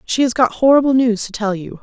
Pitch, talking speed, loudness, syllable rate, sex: 235 Hz, 265 wpm, -15 LUFS, 5.8 syllables/s, female